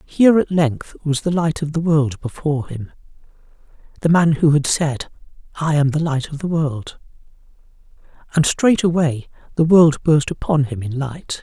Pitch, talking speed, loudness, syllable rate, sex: 150 Hz, 165 wpm, -18 LUFS, 4.6 syllables/s, male